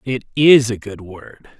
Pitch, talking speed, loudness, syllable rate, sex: 115 Hz, 190 wpm, -14 LUFS, 3.7 syllables/s, male